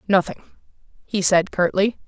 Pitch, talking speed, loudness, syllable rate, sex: 190 Hz, 115 wpm, -20 LUFS, 4.8 syllables/s, female